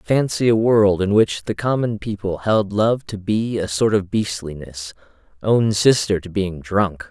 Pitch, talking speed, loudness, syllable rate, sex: 100 Hz, 175 wpm, -19 LUFS, 4.1 syllables/s, male